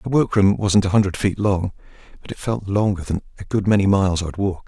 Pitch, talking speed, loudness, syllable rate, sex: 100 Hz, 230 wpm, -20 LUFS, 6.3 syllables/s, male